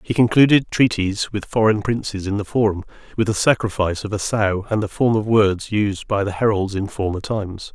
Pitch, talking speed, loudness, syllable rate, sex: 105 Hz, 210 wpm, -19 LUFS, 5.4 syllables/s, male